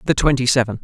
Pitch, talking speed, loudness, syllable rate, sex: 125 Hz, 215 wpm, -17 LUFS, 7.5 syllables/s, male